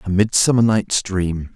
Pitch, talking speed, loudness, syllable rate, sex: 100 Hz, 155 wpm, -17 LUFS, 4.2 syllables/s, male